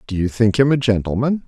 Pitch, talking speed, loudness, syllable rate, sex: 115 Hz, 245 wpm, -17 LUFS, 6.0 syllables/s, male